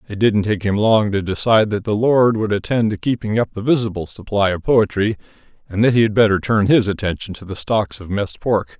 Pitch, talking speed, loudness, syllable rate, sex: 105 Hz, 230 wpm, -18 LUFS, 5.6 syllables/s, male